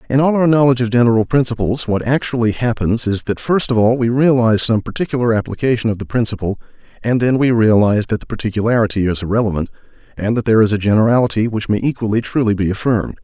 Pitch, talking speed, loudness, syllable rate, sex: 115 Hz, 200 wpm, -16 LUFS, 6.9 syllables/s, male